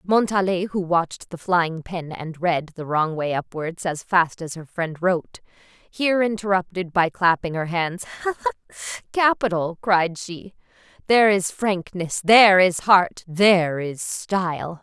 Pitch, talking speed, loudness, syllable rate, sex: 180 Hz, 140 wpm, -21 LUFS, 4.2 syllables/s, female